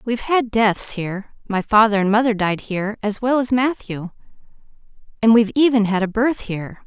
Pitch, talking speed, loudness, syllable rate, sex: 220 Hz, 175 wpm, -19 LUFS, 5.5 syllables/s, female